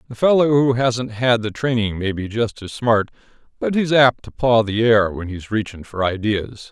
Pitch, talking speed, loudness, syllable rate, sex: 115 Hz, 215 wpm, -19 LUFS, 4.7 syllables/s, male